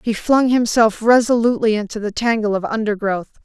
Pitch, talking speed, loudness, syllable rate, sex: 220 Hz, 155 wpm, -17 LUFS, 5.6 syllables/s, female